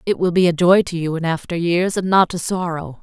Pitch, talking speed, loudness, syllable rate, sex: 175 Hz, 280 wpm, -18 LUFS, 5.5 syllables/s, female